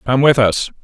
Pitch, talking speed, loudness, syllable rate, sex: 125 Hz, 215 wpm, -14 LUFS, 4.8 syllables/s, male